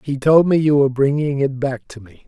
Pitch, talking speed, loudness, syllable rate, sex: 135 Hz, 265 wpm, -16 LUFS, 5.6 syllables/s, male